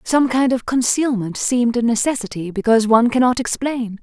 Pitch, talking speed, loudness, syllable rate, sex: 240 Hz, 165 wpm, -18 LUFS, 5.6 syllables/s, female